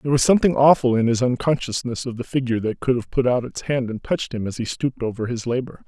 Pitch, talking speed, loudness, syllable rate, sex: 125 Hz, 265 wpm, -21 LUFS, 6.7 syllables/s, male